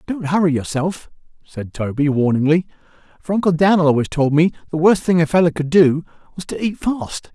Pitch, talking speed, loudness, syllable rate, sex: 160 Hz, 190 wpm, -17 LUFS, 5.4 syllables/s, male